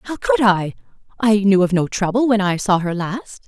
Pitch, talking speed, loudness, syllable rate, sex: 205 Hz, 225 wpm, -17 LUFS, 4.8 syllables/s, female